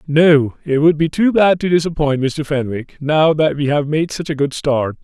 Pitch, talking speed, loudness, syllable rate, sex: 150 Hz, 225 wpm, -16 LUFS, 4.6 syllables/s, male